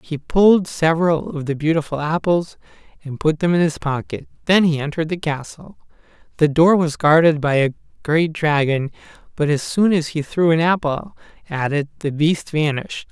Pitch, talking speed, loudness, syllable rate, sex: 155 Hz, 180 wpm, -18 LUFS, 4.9 syllables/s, male